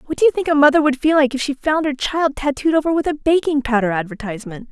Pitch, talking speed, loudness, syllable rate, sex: 280 Hz, 265 wpm, -17 LUFS, 6.6 syllables/s, female